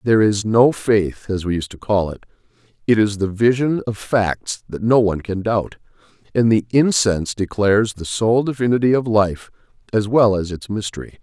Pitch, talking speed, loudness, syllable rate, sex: 105 Hz, 185 wpm, -18 LUFS, 5.0 syllables/s, male